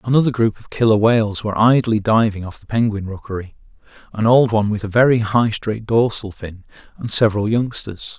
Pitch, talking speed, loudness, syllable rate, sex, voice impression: 110 Hz, 185 wpm, -17 LUFS, 5.7 syllables/s, male, masculine, slightly muffled, slightly raspy, sweet